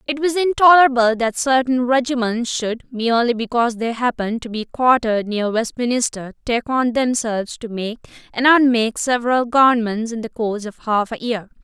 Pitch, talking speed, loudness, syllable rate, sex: 240 Hz, 165 wpm, -18 LUFS, 5.4 syllables/s, female